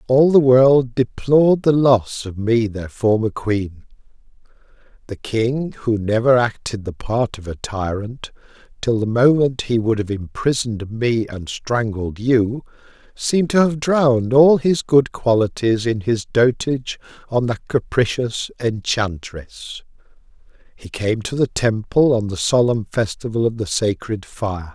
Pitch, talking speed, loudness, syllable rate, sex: 115 Hz, 145 wpm, -18 LUFS, 3.9 syllables/s, male